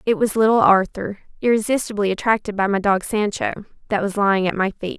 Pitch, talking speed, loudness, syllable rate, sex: 205 Hz, 195 wpm, -19 LUFS, 6.0 syllables/s, female